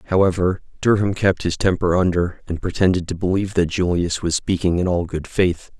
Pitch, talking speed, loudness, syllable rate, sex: 90 Hz, 185 wpm, -20 LUFS, 5.5 syllables/s, male